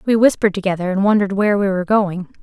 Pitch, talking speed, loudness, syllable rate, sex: 200 Hz, 225 wpm, -17 LUFS, 7.7 syllables/s, female